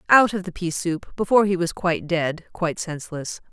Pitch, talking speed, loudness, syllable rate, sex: 175 Hz, 205 wpm, -23 LUFS, 5.7 syllables/s, female